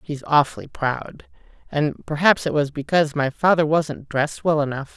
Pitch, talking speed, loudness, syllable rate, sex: 150 Hz, 170 wpm, -21 LUFS, 5.0 syllables/s, female